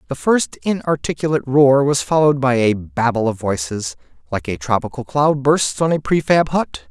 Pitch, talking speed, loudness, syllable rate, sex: 135 Hz, 165 wpm, -17 LUFS, 5.1 syllables/s, male